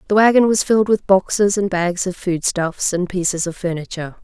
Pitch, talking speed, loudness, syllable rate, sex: 185 Hz, 215 wpm, -18 LUFS, 5.5 syllables/s, female